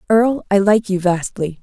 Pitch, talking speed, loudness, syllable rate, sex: 200 Hz, 185 wpm, -16 LUFS, 5.0 syllables/s, female